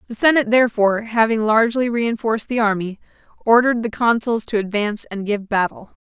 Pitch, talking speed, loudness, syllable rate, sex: 225 Hz, 160 wpm, -18 LUFS, 6.2 syllables/s, female